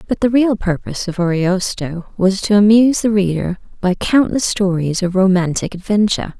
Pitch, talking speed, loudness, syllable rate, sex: 195 Hz, 160 wpm, -16 LUFS, 5.2 syllables/s, female